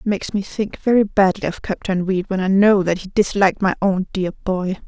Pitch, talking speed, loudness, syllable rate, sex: 195 Hz, 235 wpm, -19 LUFS, 5.4 syllables/s, female